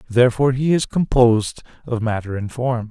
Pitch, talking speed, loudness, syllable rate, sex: 120 Hz, 165 wpm, -19 LUFS, 5.6 syllables/s, male